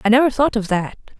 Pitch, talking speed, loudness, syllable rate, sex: 235 Hz, 250 wpm, -18 LUFS, 6.6 syllables/s, female